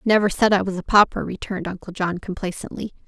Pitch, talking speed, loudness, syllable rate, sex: 190 Hz, 215 wpm, -21 LUFS, 6.9 syllables/s, female